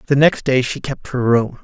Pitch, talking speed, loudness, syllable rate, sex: 135 Hz, 260 wpm, -17 LUFS, 4.9 syllables/s, male